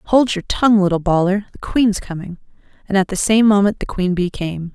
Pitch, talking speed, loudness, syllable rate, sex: 195 Hz, 215 wpm, -17 LUFS, 5.5 syllables/s, female